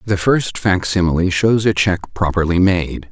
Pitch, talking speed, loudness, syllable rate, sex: 95 Hz, 155 wpm, -16 LUFS, 4.6 syllables/s, male